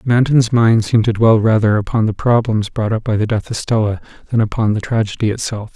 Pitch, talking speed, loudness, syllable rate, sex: 110 Hz, 220 wpm, -16 LUFS, 5.8 syllables/s, male